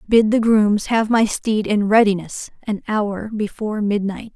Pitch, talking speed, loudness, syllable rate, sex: 210 Hz, 165 wpm, -19 LUFS, 4.3 syllables/s, female